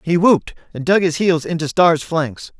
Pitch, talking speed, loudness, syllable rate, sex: 165 Hz, 210 wpm, -17 LUFS, 4.9 syllables/s, male